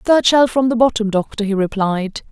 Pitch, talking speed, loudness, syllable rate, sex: 225 Hz, 205 wpm, -16 LUFS, 5.1 syllables/s, female